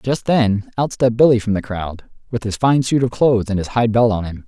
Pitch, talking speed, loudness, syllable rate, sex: 115 Hz, 270 wpm, -17 LUFS, 5.6 syllables/s, male